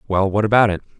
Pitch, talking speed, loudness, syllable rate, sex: 100 Hz, 180 wpm, -17 LUFS, 7.4 syllables/s, male